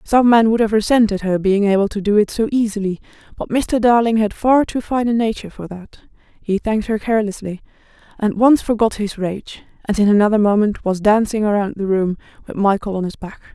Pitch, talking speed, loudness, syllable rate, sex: 210 Hz, 210 wpm, -17 LUFS, 5.7 syllables/s, female